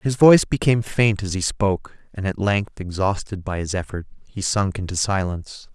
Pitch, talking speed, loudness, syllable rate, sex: 100 Hz, 190 wpm, -21 LUFS, 5.5 syllables/s, male